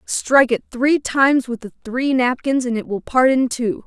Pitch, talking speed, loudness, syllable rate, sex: 250 Hz, 215 wpm, -18 LUFS, 4.7 syllables/s, female